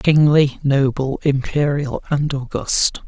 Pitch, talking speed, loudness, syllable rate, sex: 140 Hz, 95 wpm, -18 LUFS, 3.4 syllables/s, male